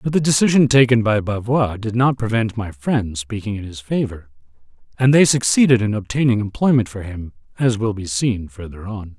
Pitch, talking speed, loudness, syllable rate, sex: 110 Hz, 190 wpm, -18 LUFS, 5.2 syllables/s, male